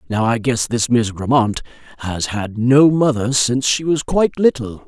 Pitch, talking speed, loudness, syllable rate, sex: 120 Hz, 185 wpm, -17 LUFS, 4.7 syllables/s, male